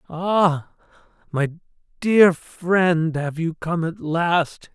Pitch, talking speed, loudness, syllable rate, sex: 170 Hz, 115 wpm, -21 LUFS, 2.6 syllables/s, male